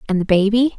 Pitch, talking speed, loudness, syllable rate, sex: 215 Hz, 230 wpm, -16 LUFS, 6.4 syllables/s, female